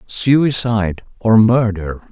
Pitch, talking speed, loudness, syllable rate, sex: 110 Hz, 115 wpm, -15 LUFS, 3.9 syllables/s, male